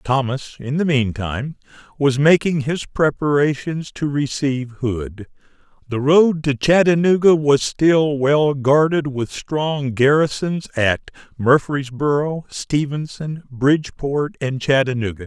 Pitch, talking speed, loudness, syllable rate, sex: 140 Hz, 110 wpm, -18 LUFS, 3.9 syllables/s, male